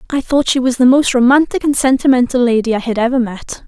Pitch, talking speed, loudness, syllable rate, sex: 255 Hz, 230 wpm, -13 LUFS, 6.1 syllables/s, female